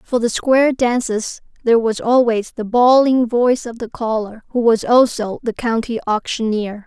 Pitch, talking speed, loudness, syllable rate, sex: 235 Hz, 165 wpm, -17 LUFS, 4.8 syllables/s, female